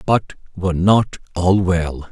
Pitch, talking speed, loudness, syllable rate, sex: 90 Hz, 140 wpm, -18 LUFS, 3.6 syllables/s, male